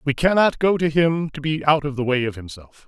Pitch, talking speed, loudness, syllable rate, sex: 150 Hz, 270 wpm, -20 LUFS, 5.4 syllables/s, male